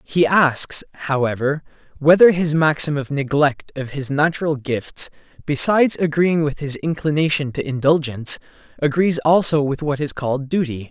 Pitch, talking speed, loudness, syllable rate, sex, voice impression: 145 Hz, 145 wpm, -19 LUFS, 4.9 syllables/s, male, masculine, adult-like, tensed, powerful, bright, clear, fluent, intellectual, refreshing, slightly calm, friendly, lively, slightly kind, slightly light